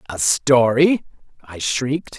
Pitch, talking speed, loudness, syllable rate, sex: 130 Hz, 110 wpm, -18 LUFS, 3.6 syllables/s, male